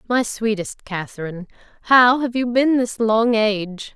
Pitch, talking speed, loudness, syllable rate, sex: 225 Hz, 150 wpm, -19 LUFS, 4.5 syllables/s, female